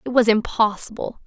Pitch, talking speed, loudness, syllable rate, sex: 225 Hz, 145 wpm, -20 LUFS, 5.3 syllables/s, female